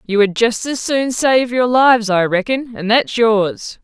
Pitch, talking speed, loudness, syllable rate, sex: 230 Hz, 205 wpm, -15 LUFS, 4.1 syllables/s, female